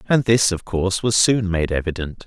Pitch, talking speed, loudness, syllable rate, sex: 100 Hz, 210 wpm, -19 LUFS, 5.2 syllables/s, male